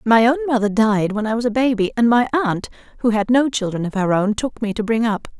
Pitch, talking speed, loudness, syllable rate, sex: 225 Hz, 265 wpm, -18 LUFS, 5.8 syllables/s, female